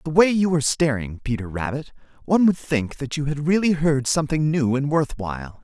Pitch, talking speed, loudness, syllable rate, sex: 145 Hz, 215 wpm, -21 LUFS, 5.7 syllables/s, male